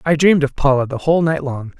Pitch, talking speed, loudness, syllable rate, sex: 170 Hz, 270 wpm, -16 LUFS, 6.7 syllables/s, female